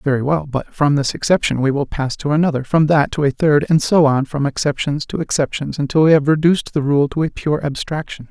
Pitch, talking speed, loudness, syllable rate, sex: 145 Hz, 240 wpm, -17 LUFS, 5.7 syllables/s, male